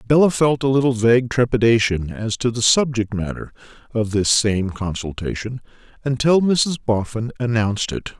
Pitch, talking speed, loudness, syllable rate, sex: 120 Hz, 145 wpm, -19 LUFS, 5.0 syllables/s, male